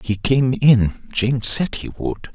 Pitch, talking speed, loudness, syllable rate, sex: 125 Hz, 180 wpm, -19 LUFS, 3.2 syllables/s, male